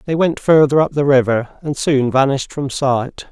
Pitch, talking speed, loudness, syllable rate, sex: 140 Hz, 200 wpm, -16 LUFS, 4.9 syllables/s, male